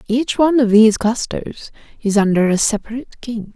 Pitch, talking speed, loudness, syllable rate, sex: 230 Hz, 170 wpm, -16 LUFS, 5.7 syllables/s, female